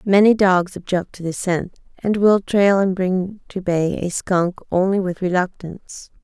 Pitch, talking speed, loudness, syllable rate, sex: 185 Hz, 175 wpm, -19 LUFS, 4.3 syllables/s, female